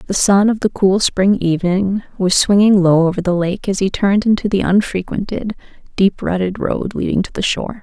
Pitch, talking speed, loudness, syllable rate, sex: 195 Hz, 200 wpm, -16 LUFS, 5.2 syllables/s, female